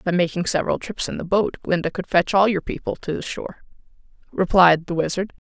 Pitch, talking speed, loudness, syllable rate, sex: 180 Hz, 210 wpm, -21 LUFS, 5.9 syllables/s, female